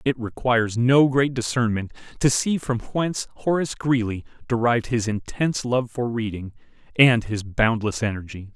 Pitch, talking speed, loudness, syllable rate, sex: 120 Hz, 145 wpm, -22 LUFS, 5.0 syllables/s, male